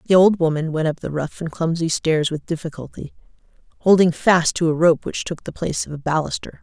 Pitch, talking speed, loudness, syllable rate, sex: 160 Hz, 210 wpm, -20 LUFS, 5.5 syllables/s, female